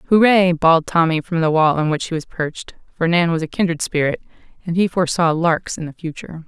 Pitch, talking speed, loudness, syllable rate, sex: 165 Hz, 220 wpm, -18 LUFS, 6.2 syllables/s, female